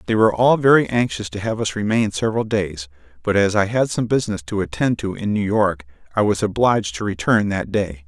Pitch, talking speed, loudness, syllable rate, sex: 100 Hz, 225 wpm, -19 LUFS, 5.8 syllables/s, male